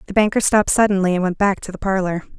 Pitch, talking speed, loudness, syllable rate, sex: 195 Hz, 250 wpm, -18 LUFS, 7.1 syllables/s, female